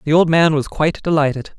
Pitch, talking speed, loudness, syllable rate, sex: 155 Hz, 225 wpm, -16 LUFS, 6.2 syllables/s, male